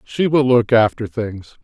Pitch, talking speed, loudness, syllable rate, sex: 115 Hz, 185 wpm, -16 LUFS, 4.1 syllables/s, male